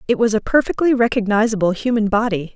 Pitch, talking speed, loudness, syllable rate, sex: 220 Hz, 165 wpm, -17 LUFS, 6.3 syllables/s, female